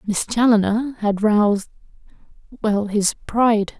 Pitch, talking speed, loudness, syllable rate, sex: 215 Hz, 95 wpm, -19 LUFS, 4.1 syllables/s, female